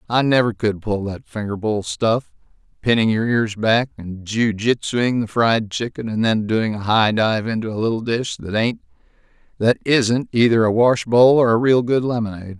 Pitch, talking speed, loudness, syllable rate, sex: 115 Hz, 185 wpm, -19 LUFS, 4.7 syllables/s, male